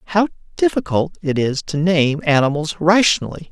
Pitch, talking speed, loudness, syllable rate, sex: 155 Hz, 135 wpm, -17 LUFS, 5.1 syllables/s, male